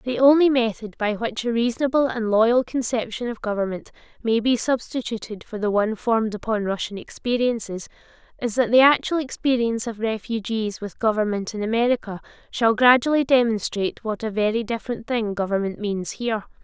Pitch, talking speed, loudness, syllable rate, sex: 225 Hz, 160 wpm, -22 LUFS, 5.5 syllables/s, female